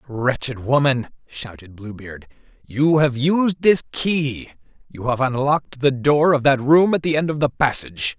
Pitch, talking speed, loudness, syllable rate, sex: 135 Hz, 170 wpm, -19 LUFS, 4.4 syllables/s, male